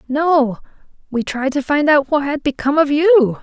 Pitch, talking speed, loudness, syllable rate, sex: 285 Hz, 195 wpm, -16 LUFS, 4.7 syllables/s, female